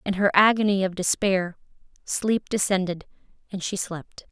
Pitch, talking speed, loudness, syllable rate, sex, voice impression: 190 Hz, 140 wpm, -23 LUFS, 4.5 syllables/s, female, very feminine, young, very thin, very tensed, powerful, very bright, slightly soft, very clear, very fluent, very cute, intellectual, very refreshing, sincere, calm, friendly, very reassuring, very unique, elegant, slightly wild, sweet, very lively, kind, intense, light